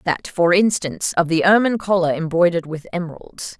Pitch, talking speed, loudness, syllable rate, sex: 175 Hz, 165 wpm, -18 LUFS, 6.0 syllables/s, female